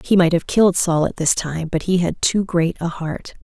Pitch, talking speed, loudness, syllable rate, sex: 170 Hz, 260 wpm, -19 LUFS, 5.0 syllables/s, female